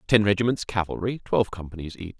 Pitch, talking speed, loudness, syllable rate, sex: 100 Hz, 165 wpm, -25 LUFS, 6.5 syllables/s, male